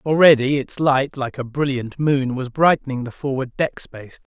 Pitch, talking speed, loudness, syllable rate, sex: 135 Hz, 180 wpm, -19 LUFS, 4.8 syllables/s, male